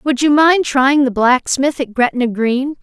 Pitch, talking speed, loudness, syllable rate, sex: 265 Hz, 190 wpm, -14 LUFS, 4.0 syllables/s, female